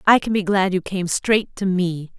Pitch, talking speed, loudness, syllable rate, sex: 190 Hz, 245 wpm, -20 LUFS, 4.5 syllables/s, female